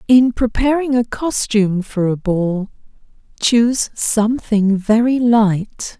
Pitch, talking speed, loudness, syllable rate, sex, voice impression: 225 Hz, 110 wpm, -16 LUFS, 3.7 syllables/s, female, feminine, adult-like, slightly refreshing, slightly sincere, friendly